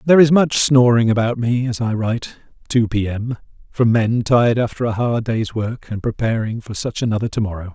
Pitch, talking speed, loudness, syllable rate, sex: 115 Hz, 210 wpm, -18 LUFS, 5.5 syllables/s, male